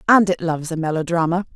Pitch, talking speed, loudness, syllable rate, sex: 170 Hz, 195 wpm, -20 LUFS, 6.7 syllables/s, female